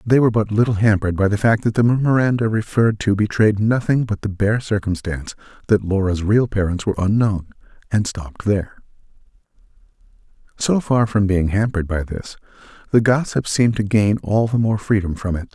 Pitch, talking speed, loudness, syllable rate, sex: 105 Hz, 180 wpm, -19 LUFS, 5.8 syllables/s, male